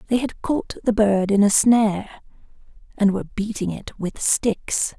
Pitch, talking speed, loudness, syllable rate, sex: 210 Hz, 170 wpm, -21 LUFS, 4.3 syllables/s, female